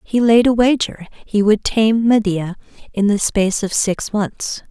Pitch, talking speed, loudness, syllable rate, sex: 210 Hz, 180 wpm, -16 LUFS, 4.3 syllables/s, female